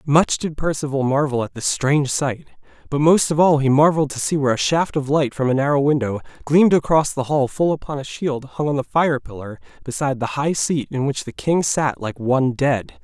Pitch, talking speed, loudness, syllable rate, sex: 140 Hz, 230 wpm, -19 LUFS, 5.5 syllables/s, male